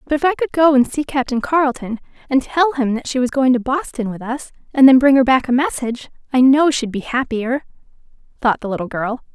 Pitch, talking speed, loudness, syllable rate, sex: 260 Hz, 230 wpm, -17 LUFS, 5.8 syllables/s, female